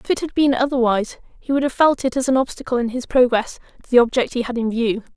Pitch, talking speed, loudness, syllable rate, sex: 250 Hz, 265 wpm, -19 LUFS, 6.7 syllables/s, female